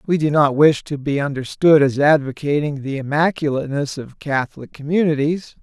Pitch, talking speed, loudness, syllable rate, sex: 145 Hz, 150 wpm, -18 LUFS, 5.3 syllables/s, male